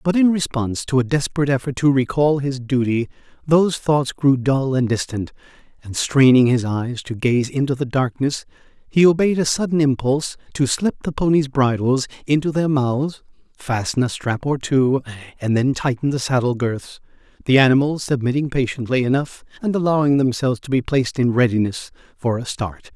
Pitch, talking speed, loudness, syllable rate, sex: 135 Hz, 175 wpm, -19 LUFS, 5.3 syllables/s, male